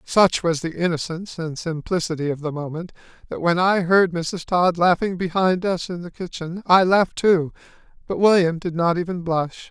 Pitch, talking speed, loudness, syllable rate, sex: 175 Hz, 185 wpm, -21 LUFS, 5.0 syllables/s, male